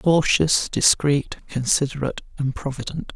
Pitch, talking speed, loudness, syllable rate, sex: 140 Hz, 95 wpm, -21 LUFS, 4.4 syllables/s, male